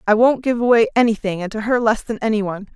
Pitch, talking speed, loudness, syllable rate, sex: 220 Hz, 260 wpm, -18 LUFS, 6.8 syllables/s, female